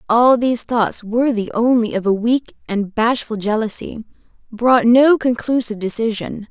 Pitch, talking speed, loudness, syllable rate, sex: 230 Hz, 140 wpm, -17 LUFS, 4.6 syllables/s, female